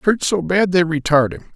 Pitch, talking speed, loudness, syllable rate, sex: 165 Hz, 230 wpm, -17 LUFS, 5.6 syllables/s, male